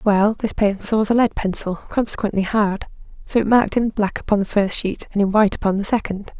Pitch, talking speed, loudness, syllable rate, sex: 205 Hz, 225 wpm, -19 LUFS, 5.9 syllables/s, female